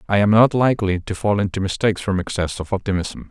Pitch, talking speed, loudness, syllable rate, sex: 100 Hz, 220 wpm, -19 LUFS, 6.4 syllables/s, male